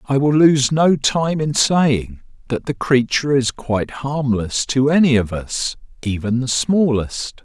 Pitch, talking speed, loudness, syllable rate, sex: 135 Hz, 160 wpm, -17 LUFS, 4.0 syllables/s, male